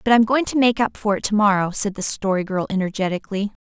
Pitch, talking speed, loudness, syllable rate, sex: 205 Hz, 245 wpm, -20 LUFS, 6.3 syllables/s, female